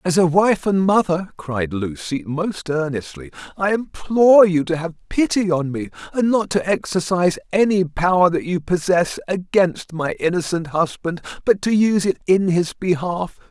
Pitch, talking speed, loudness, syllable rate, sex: 175 Hz, 165 wpm, -19 LUFS, 4.7 syllables/s, male